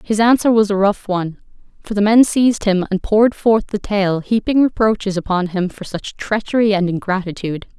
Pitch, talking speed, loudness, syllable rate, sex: 205 Hz, 195 wpm, -17 LUFS, 5.5 syllables/s, female